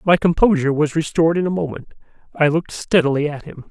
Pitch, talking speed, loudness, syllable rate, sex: 160 Hz, 195 wpm, -18 LUFS, 6.8 syllables/s, male